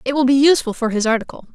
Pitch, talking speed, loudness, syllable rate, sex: 255 Hz, 275 wpm, -16 LUFS, 7.9 syllables/s, female